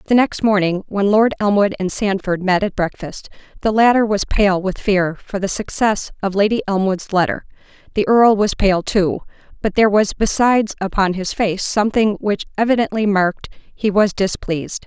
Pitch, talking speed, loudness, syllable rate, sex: 200 Hz, 170 wpm, -17 LUFS, 5.1 syllables/s, female